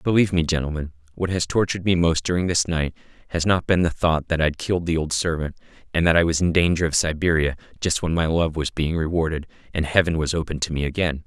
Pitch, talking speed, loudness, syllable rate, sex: 85 Hz, 235 wpm, -22 LUFS, 6.3 syllables/s, male